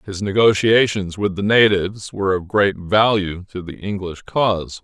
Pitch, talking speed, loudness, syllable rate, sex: 100 Hz, 160 wpm, -18 LUFS, 4.7 syllables/s, male